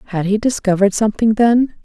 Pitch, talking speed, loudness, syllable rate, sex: 215 Hz, 165 wpm, -15 LUFS, 6.5 syllables/s, female